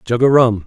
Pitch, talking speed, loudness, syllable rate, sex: 120 Hz, 270 wpm, -13 LUFS, 5.5 syllables/s, male